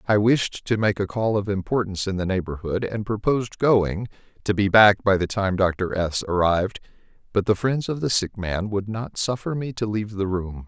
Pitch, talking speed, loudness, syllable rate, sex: 100 Hz, 215 wpm, -23 LUFS, 5.2 syllables/s, male